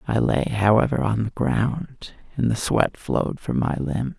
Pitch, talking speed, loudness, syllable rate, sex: 115 Hz, 185 wpm, -22 LUFS, 4.2 syllables/s, male